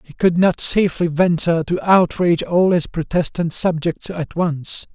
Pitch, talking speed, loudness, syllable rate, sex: 170 Hz, 160 wpm, -18 LUFS, 4.6 syllables/s, male